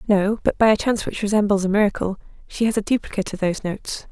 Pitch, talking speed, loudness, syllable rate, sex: 205 Hz, 235 wpm, -21 LUFS, 7.1 syllables/s, female